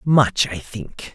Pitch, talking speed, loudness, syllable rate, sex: 115 Hz, 155 wpm, -20 LUFS, 2.9 syllables/s, male